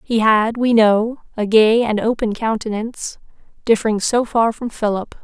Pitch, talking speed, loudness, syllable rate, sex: 220 Hz, 160 wpm, -17 LUFS, 4.7 syllables/s, female